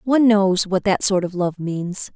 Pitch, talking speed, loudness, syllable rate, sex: 195 Hz, 220 wpm, -19 LUFS, 4.4 syllables/s, female